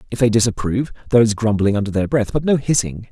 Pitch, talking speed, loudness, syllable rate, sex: 115 Hz, 230 wpm, -18 LUFS, 7.0 syllables/s, male